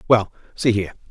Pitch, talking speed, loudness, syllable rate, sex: 105 Hz, 165 wpm, -21 LUFS, 6.8 syllables/s, male